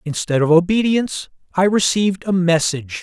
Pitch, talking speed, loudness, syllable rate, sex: 180 Hz, 140 wpm, -17 LUFS, 5.6 syllables/s, male